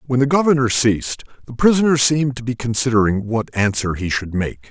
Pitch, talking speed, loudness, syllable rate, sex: 120 Hz, 190 wpm, -18 LUFS, 5.9 syllables/s, male